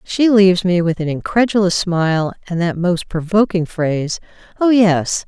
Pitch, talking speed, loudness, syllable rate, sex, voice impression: 185 Hz, 160 wpm, -16 LUFS, 4.8 syllables/s, female, feminine, adult-like, slightly powerful, hard, clear, fluent, intellectual, calm, elegant, slightly strict, sharp